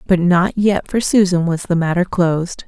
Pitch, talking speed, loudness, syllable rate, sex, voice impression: 180 Hz, 200 wpm, -16 LUFS, 4.8 syllables/s, female, feminine, adult-like, slightly muffled, intellectual, slightly calm, elegant